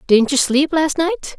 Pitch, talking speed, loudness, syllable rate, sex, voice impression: 295 Hz, 215 wpm, -16 LUFS, 5.0 syllables/s, female, feminine, slightly young, slightly refreshing, slightly calm, friendly